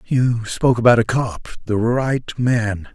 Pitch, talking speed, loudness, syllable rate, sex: 115 Hz, 145 wpm, -18 LUFS, 3.9 syllables/s, male